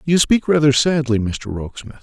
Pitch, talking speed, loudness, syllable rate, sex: 135 Hz, 175 wpm, -17 LUFS, 5.3 syllables/s, male